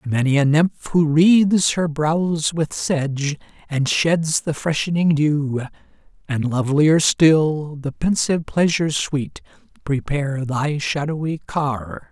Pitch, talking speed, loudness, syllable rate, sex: 150 Hz, 130 wpm, -19 LUFS, 3.9 syllables/s, male